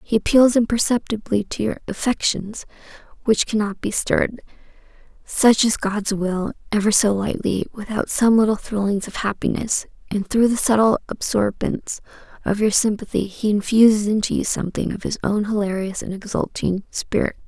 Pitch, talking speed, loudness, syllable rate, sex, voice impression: 215 Hz, 140 wpm, -20 LUFS, 5.0 syllables/s, female, feminine, slightly young, relaxed, weak, slightly dark, soft, muffled, raspy, calm, slightly reassuring, kind, modest